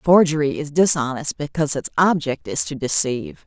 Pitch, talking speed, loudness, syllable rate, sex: 150 Hz, 155 wpm, -20 LUFS, 5.4 syllables/s, female